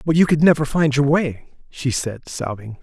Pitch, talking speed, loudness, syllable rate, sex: 140 Hz, 210 wpm, -19 LUFS, 4.7 syllables/s, male